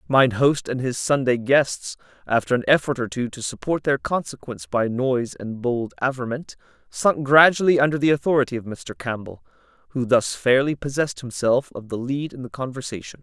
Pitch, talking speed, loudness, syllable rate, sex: 130 Hz, 175 wpm, -22 LUFS, 5.3 syllables/s, male